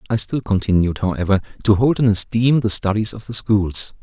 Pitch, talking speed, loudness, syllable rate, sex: 105 Hz, 195 wpm, -18 LUFS, 5.3 syllables/s, male